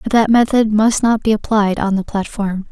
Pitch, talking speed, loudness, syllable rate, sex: 215 Hz, 220 wpm, -15 LUFS, 4.9 syllables/s, female